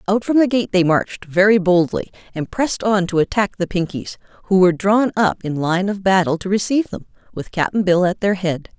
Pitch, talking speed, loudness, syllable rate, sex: 190 Hz, 220 wpm, -18 LUFS, 5.5 syllables/s, female